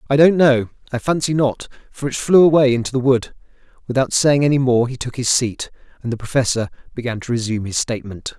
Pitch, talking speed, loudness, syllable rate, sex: 130 Hz, 205 wpm, -18 LUFS, 6.2 syllables/s, male